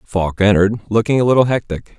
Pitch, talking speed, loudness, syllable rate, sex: 105 Hz, 180 wpm, -15 LUFS, 6.1 syllables/s, male